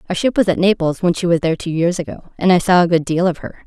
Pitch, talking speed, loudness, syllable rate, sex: 175 Hz, 325 wpm, -16 LUFS, 7.0 syllables/s, female